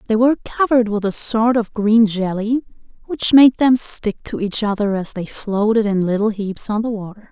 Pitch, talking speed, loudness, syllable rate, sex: 215 Hz, 205 wpm, -17 LUFS, 5.0 syllables/s, female